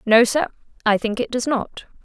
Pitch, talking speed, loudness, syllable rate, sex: 235 Hz, 205 wpm, -20 LUFS, 5.0 syllables/s, female